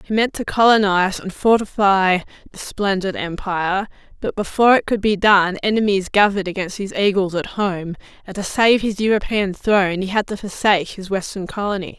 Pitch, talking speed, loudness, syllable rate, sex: 195 Hz, 175 wpm, -18 LUFS, 5.4 syllables/s, female